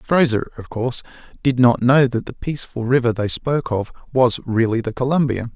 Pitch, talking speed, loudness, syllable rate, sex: 125 Hz, 185 wpm, -19 LUFS, 5.5 syllables/s, male